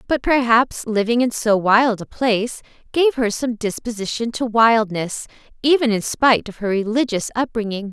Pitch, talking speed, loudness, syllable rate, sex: 230 Hz, 160 wpm, -19 LUFS, 4.8 syllables/s, female